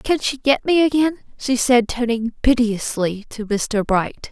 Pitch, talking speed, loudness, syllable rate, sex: 240 Hz, 165 wpm, -19 LUFS, 4.0 syllables/s, female